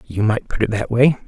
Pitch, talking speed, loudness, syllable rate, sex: 115 Hz, 280 wpm, -19 LUFS, 5.6 syllables/s, male